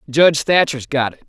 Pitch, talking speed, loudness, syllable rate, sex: 140 Hz, 190 wpm, -16 LUFS, 5.7 syllables/s, male